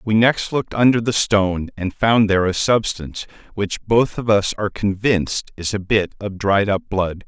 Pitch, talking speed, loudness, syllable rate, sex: 105 Hz, 200 wpm, -19 LUFS, 5.0 syllables/s, male